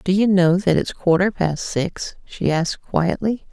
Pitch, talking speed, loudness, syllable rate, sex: 185 Hz, 190 wpm, -19 LUFS, 4.2 syllables/s, female